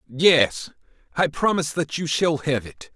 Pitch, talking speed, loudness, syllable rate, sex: 150 Hz, 165 wpm, -21 LUFS, 4.7 syllables/s, male